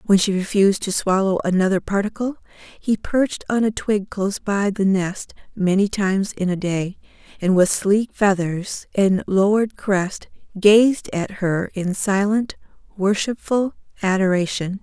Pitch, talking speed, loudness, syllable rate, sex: 200 Hz, 140 wpm, -20 LUFS, 4.4 syllables/s, female